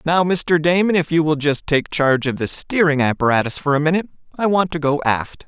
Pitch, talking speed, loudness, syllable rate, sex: 155 Hz, 230 wpm, -18 LUFS, 5.7 syllables/s, male